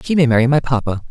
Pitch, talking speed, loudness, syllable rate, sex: 135 Hz, 270 wpm, -15 LUFS, 7.5 syllables/s, male